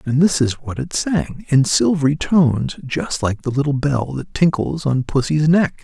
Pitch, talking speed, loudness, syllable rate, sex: 145 Hz, 195 wpm, -18 LUFS, 4.4 syllables/s, male